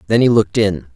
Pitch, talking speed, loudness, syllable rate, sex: 110 Hz, 250 wpm, -15 LUFS, 7.0 syllables/s, male